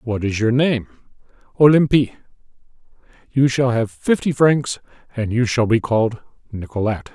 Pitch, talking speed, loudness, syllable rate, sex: 120 Hz, 135 wpm, -18 LUFS, 5.0 syllables/s, male